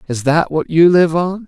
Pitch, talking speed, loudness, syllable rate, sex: 165 Hz, 245 wpm, -14 LUFS, 4.7 syllables/s, male